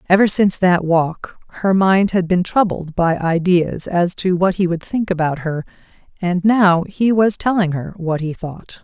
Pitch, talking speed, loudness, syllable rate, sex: 180 Hz, 190 wpm, -17 LUFS, 4.3 syllables/s, female